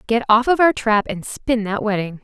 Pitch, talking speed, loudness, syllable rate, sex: 225 Hz, 240 wpm, -18 LUFS, 4.9 syllables/s, female